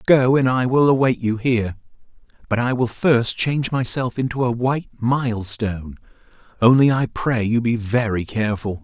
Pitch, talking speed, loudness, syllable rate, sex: 120 Hz, 165 wpm, -19 LUFS, 5.1 syllables/s, male